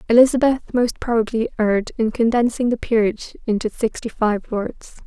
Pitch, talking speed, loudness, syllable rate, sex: 230 Hz, 140 wpm, -20 LUFS, 5.3 syllables/s, female